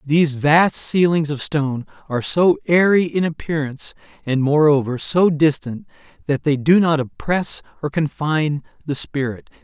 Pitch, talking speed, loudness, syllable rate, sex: 150 Hz, 145 wpm, -18 LUFS, 4.8 syllables/s, male